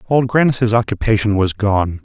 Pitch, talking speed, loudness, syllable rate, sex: 110 Hz, 145 wpm, -16 LUFS, 4.9 syllables/s, male